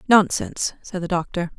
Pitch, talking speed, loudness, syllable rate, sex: 185 Hz, 150 wpm, -22 LUFS, 5.3 syllables/s, female